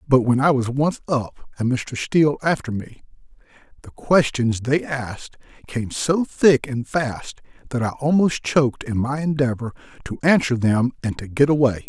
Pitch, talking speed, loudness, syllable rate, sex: 130 Hz, 170 wpm, -20 LUFS, 4.7 syllables/s, male